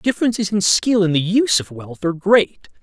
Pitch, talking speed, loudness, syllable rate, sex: 195 Hz, 210 wpm, -17 LUFS, 5.6 syllables/s, male